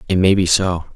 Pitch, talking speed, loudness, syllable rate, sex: 90 Hz, 255 wpm, -16 LUFS, 5.6 syllables/s, male